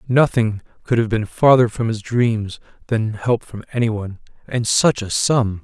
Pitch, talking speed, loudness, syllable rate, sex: 115 Hz, 170 wpm, -19 LUFS, 4.6 syllables/s, male